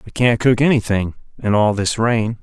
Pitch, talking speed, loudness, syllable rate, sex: 110 Hz, 200 wpm, -17 LUFS, 4.4 syllables/s, male